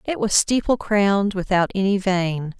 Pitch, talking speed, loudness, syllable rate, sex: 200 Hz, 160 wpm, -20 LUFS, 4.5 syllables/s, female